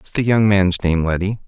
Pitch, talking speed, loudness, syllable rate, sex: 95 Hz, 245 wpm, -17 LUFS, 6.7 syllables/s, male